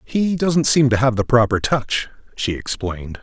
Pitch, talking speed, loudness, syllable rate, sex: 120 Hz, 185 wpm, -19 LUFS, 4.6 syllables/s, male